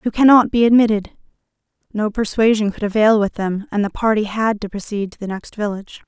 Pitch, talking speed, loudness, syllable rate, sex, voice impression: 215 Hz, 200 wpm, -17 LUFS, 5.8 syllables/s, female, feminine, adult-like, slightly soft, slightly calm, friendly, reassuring, slightly sweet